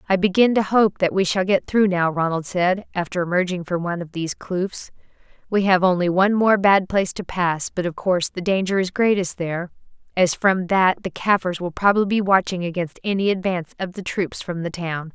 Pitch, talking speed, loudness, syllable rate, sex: 185 Hz, 215 wpm, -20 LUFS, 5.5 syllables/s, female